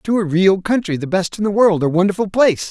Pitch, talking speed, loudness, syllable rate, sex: 190 Hz, 220 wpm, -16 LUFS, 6.0 syllables/s, male